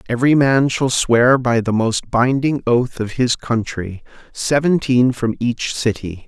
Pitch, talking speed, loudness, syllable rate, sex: 120 Hz, 155 wpm, -17 LUFS, 4.0 syllables/s, male